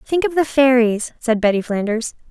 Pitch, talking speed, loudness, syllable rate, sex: 245 Hz, 185 wpm, -17 LUFS, 5.0 syllables/s, female